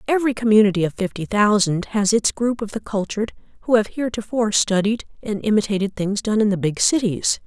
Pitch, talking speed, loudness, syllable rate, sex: 210 Hz, 185 wpm, -20 LUFS, 6.1 syllables/s, female